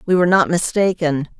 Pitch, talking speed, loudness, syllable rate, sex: 170 Hz, 170 wpm, -17 LUFS, 6.0 syllables/s, female